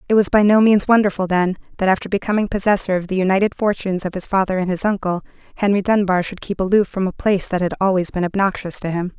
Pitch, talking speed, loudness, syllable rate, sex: 190 Hz, 235 wpm, -18 LUFS, 6.7 syllables/s, female